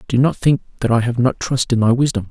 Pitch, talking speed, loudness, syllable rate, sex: 125 Hz, 285 wpm, -17 LUFS, 6.1 syllables/s, male